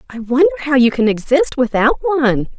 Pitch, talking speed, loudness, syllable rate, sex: 260 Hz, 185 wpm, -15 LUFS, 6.7 syllables/s, female